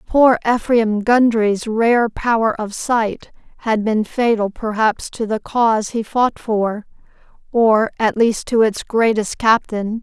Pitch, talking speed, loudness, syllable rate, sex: 225 Hz, 145 wpm, -17 LUFS, 3.7 syllables/s, female